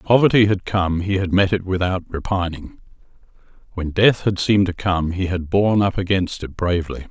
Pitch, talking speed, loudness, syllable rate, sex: 95 Hz, 195 wpm, -19 LUFS, 5.6 syllables/s, male